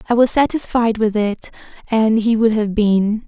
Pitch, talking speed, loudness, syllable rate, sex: 220 Hz, 185 wpm, -16 LUFS, 4.4 syllables/s, female